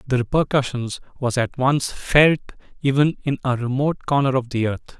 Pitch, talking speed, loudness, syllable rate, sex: 130 Hz, 170 wpm, -21 LUFS, 6.6 syllables/s, male